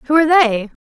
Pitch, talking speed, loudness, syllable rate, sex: 280 Hz, 215 wpm, -13 LUFS, 5.7 syllables/s, female